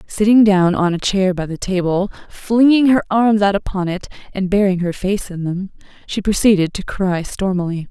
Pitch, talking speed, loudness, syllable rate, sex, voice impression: 195 Hz, 190 wpm, -17 LUFS, 4.9 syllables/s, female, very feminine, slightly young, slightly adult-like, thin, slightly tensed, powerful, slightly bright, hard, very clear, very fluent, very cute, slightly cool, intellectual, very refreshing, sincere, slightly calm, slightly friendly, reassuring, very unique, elegant, slightly wild, slightly sweet, lively, slightly kind, slightly intense, light